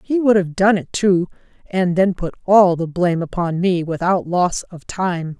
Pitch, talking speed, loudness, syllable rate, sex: 180 Hz, 200 wpm, -18 LUFS, 4.4 syllables/s, female